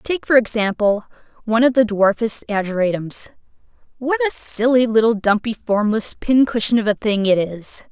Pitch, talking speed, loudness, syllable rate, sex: 225 Hz, 150 wpm, -18 LUFS, 4.9 syllables/s, female